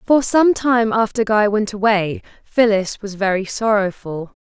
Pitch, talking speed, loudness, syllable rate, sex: 215 Hz, 150 wpm, -17 LUFS, 4.2 syllables/s, female